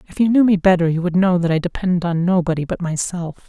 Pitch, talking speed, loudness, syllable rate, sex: 175 Hz, 260 wpm, -18 LUFS, 6.1 syllables/s, female